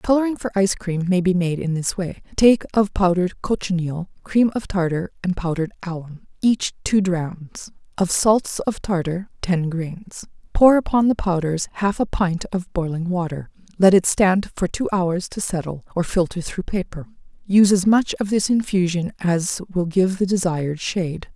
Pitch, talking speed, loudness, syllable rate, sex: 185 Hz, 175 wpm, -20 LUFS, 4.7 syllables/s, female